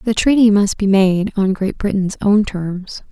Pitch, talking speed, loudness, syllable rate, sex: 200 Hz, 195 wpm, -16 LUFS, 4.2 syllables/s, female